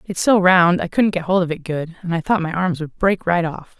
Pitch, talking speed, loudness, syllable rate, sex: 175 Hz, 300 wpm, -18 LUFS, 5.2 syllables/s, female